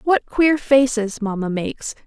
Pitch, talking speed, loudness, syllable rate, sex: 240 Hz, 145 wpm, -19 LUFS, 4.3 syllables/s, female